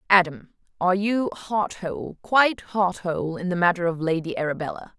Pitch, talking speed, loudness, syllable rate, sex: 185 Hz, 170 wpm, -24 LUFS, 5.3 syllables/s, female